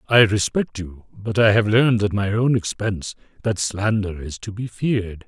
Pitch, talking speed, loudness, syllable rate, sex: 105 Hz, 195 wpm, -21 LUFS, 4.9 syllables/s, male